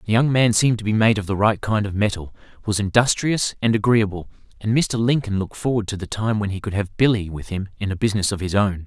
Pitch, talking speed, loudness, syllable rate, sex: 105 Hz, 255 wpm, -21 LUFS, 6.3 syllables/s, male